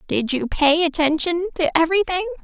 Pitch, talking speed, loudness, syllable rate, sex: 330 Hz, 150 wpm, -19 LUFS, 6.0 syllables/s, female